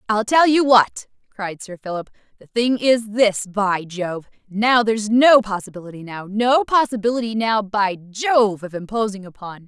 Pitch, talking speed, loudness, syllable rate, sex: 215 Hz, 160 wpm, -19 LUFS, 4.6 syllables/s, female